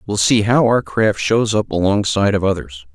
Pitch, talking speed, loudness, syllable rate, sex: 105 Hz, 205 wpm, -16 LUFS, 5.1 syllables/s, male